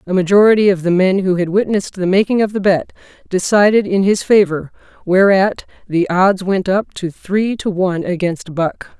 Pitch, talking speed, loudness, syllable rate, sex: 190 Hz, 185 wpm, -15 LUFS, 5.1 syllables/s, female